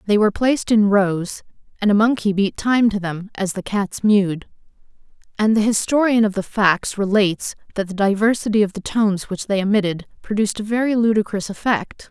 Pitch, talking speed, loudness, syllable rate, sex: 205 Hz, 185 wpm, -19 LUFS, 5.5 syllables/s, female